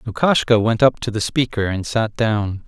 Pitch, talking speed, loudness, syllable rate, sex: 115 Hz, 200 wpm, -18 LUFS, 4.7 syllables/s, male